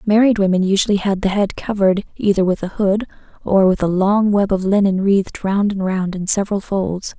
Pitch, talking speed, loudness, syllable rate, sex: 195 Hz, 210 wpm, -17 LUFS, 5.5 syllables/s, female